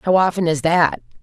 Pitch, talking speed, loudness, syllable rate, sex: 165 Hz, 195 wpm, -17 LUFS, 5.0 syllables/s, female